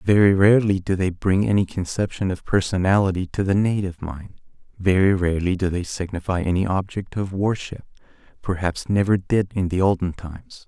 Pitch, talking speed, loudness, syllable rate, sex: 95 Hz, 165 wpm, -21 LUFS, 5.5 syllables/s, male